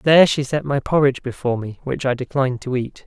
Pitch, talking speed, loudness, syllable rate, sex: 135 Hz, 235 wpm, -20 LUFS, 6.4 syllables/s, male